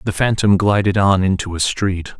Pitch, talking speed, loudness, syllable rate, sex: 100 Hz, 190 wpm, -16 LUFS, 5.0 syllables/s, male